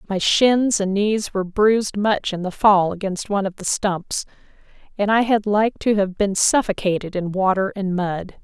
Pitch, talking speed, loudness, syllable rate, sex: 200 Hz, 190 wpm, -20 LUFS, 4.7 syllables/s, female